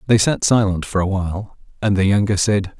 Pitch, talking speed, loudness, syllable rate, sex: 100 Hz, 215 wpm, -18 LUFS, 5.4 syllables/s, male